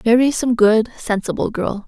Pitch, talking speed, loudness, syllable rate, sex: 225 Hz, 160 wpm, -17 LUFS, 4.8 syllables/s, female